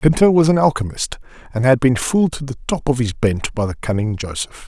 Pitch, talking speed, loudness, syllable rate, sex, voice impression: 130 Hz, 230 wpm, -18 LUFS, 5.6 syllables/s, male, masculine, adult-like, slightly powerful, slightly bright, slightly fluent, cool, calm, slightly mature, friendly, unique, wild, lively